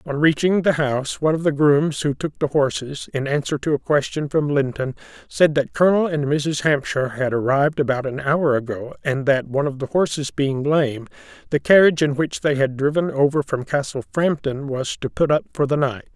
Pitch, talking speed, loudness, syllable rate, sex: 145 Hz, 210 wpm, -20 LUFS, 5.4 syllables/s, male